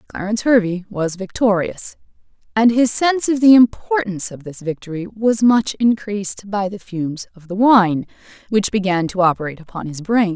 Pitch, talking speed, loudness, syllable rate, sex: 200 Hz, 170 wpm, -18 LUFS, 5.3 syllables/s, female